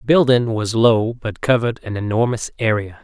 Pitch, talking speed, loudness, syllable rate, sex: 115 Hz, 180 wpm, -18 LUFS, 5.1 syllables/s, male